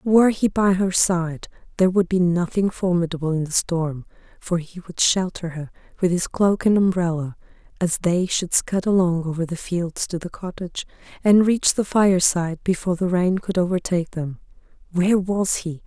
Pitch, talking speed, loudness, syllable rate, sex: 180 Hz, 180 wpm, -21 LUFS, 5.1 syllables/s, female